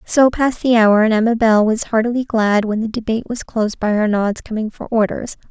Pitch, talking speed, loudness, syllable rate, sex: 220 Hz, 205 wpm, -16 LUFS, 5.8 syllables/s, female